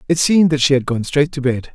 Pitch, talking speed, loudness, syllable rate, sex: 140 Hz, 310 wpm, -16 LUFS, 6.4 syllables/s, male